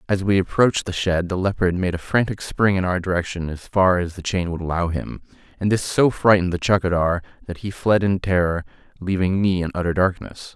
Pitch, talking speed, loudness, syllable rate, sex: 90 Hz, 215 wpm, -21 LUFS, 5.7 syllables/s, male